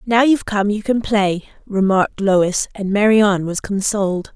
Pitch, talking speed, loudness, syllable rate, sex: 205 Hz, 165 wpm, -17 LUFS, 4.8 syllables/s, female